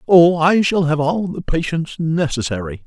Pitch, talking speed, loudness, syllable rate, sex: 160 Hz, 170 wpm, -17 LUFS, 4.8 syllables/s, male